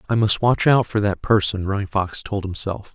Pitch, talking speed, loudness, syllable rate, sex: 105 Hz, 225 wpm, -20 LUFS, 5.1 syllables/s, male